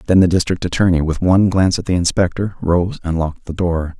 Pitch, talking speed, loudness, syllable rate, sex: 90 Hz, 225 wpm, -17 LUFS, 6.2 syllables/s, male